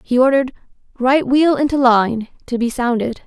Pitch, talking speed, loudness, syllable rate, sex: 255 Hz, 165 wpm, -16 LUFS, 5.1 syllables/s, female